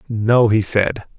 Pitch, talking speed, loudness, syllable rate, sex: 110 Hz, 150 wpm, -16 LUFS, 3.3 syllables/s, male